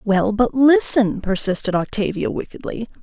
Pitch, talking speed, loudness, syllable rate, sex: 220 Hz, 120 wpm, -18 LUFS, 4.6 syllables/s, female